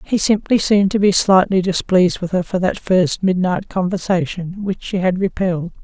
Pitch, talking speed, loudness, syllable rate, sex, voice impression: 185 Hz, 185 wpm, -17 LUFS, 5.2 syllables/s, female, very feminine, very adult-like, slightly old, very thin, slightly tensed, weak, dark, soft, slightly muffled, slightly fluent, slightly cute, very intellectual, refreshing, very sincere, very calm, very friendly, very reassuring, unique, very elegant, sweet, very kind, slightly sharp, modest